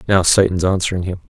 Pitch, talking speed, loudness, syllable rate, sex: 90 Hz, 175 wpm, -17 LUFS, 6.5 syllables/s, male